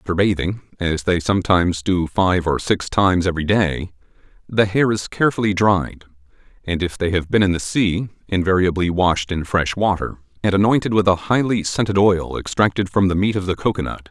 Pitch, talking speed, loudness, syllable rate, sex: 95 Hz, 185 wpm, -19 LUFS, 5.4 syllables/s, male